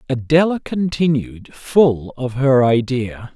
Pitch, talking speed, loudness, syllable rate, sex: 135 Hz, 105 wpm, -17 LUFS, 3.5 syllables/s, male